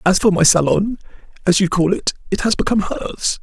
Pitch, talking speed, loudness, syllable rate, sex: 190 Hz, 210 wpm, -17 LUFS, 6.1 syllables/s, male